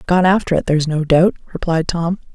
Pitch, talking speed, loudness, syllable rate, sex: 170 Hz, 205 wpm, -16 LUFS, 5.8 syllables/s, female